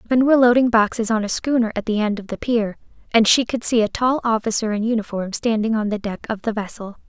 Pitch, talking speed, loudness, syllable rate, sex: 225 Hz, 245 wpm, -19 LUFS, 6.0 syllables/s, female